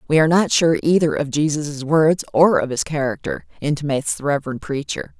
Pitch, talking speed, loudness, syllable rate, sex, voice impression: 150 Hz, 185 wpm, -19 LUFS, 5.6 syllables/s, female, very feminine, middle-aged, slightly thin, tensed, slightly powerful, slightly dark, slightly hard, clear, fluent, slightly raspy, slightly cool, intellectual, slightly refreshing, slightly sincere, calm, slightly friendly, slightly reassuring, very unique, slightly elegant, wild, slightly sweet, lively, strict, slightly intense, sharp, slightly light